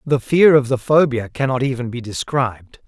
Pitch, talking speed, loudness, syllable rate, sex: 130 Hz, 190 wpm, -17 LUFS, 5.1 syllables/s, male